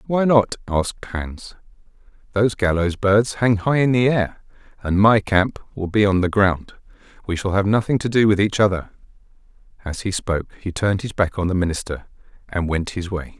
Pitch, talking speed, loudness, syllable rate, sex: 100 Hz, 195 wpm, -20 LUFS, 5.3 syllables/s, male